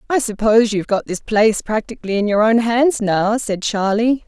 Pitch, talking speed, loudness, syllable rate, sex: 220 Hz, 195 wpm, -17 LUFS, 5.5 syllables/s, female